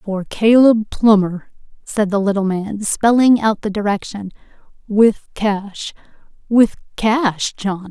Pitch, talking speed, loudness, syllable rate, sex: 210 Hz, 120 wpm, -16 LUFS, 3.6 syllables/s, female